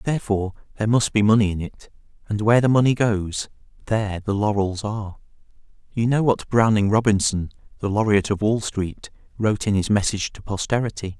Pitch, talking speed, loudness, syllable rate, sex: 105 Hz, 170 wpm, -21 LUFS, 6.0 syllables/s, male